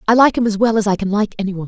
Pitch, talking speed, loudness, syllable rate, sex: 210 Hz, 395 wpm, -16 LUFS, 8.5 syllables/s, female